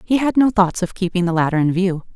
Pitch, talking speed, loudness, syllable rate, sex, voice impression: 190 Hz, 280 wpm, -18 LUFS, 6.0 syllables/s, female, feminine, adult-like, tensed, clear, fluent, intellectual, calm, friendly, reassuring, elegant, slightly lively, kind